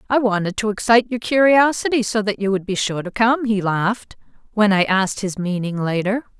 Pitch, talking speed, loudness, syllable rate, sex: 210 Hz, 205 wpm, -18 LUFS, 5.5 syllables/s, female